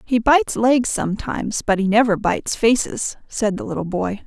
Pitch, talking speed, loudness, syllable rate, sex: 225 Hz, 185 wpm, -19 LUFS, 5.2 syllables/s, female